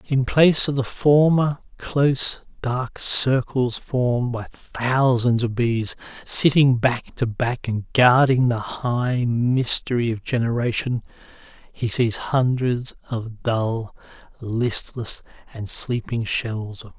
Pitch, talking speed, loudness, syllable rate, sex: 120 Hz, 125 wpm, -21 LUFS, 3.5 syllables/s, male